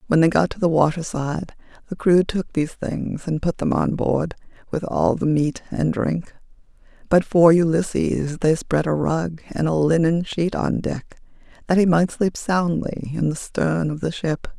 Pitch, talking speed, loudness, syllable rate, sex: 165 Hz, 195 wpm, -21 LUFS, 4.4 syllables/s, female